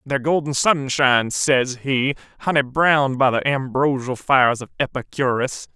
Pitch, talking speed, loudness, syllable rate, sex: 135 Hz, 135 wpm, -19 LUFS, 4.8 syllables/s, male